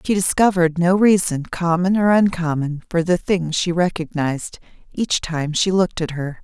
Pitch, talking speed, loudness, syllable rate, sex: 175 Hz, 175 wpm, -19 LUFS, 5.0 syllables/s, female